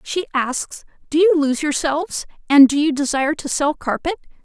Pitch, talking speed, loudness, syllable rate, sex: 300 Hz, 175 wpm, -18 LUFS, 5.1 syllables/s, female